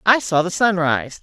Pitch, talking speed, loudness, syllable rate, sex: 175 Hz, 245 wpm, -18 LUFS, 4.4 syllables/s, female